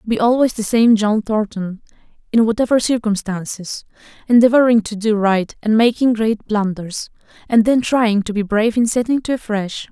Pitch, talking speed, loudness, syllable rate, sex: 220 Hz, 165 wpm, -17 LUFS, 5.0 syllables/s, female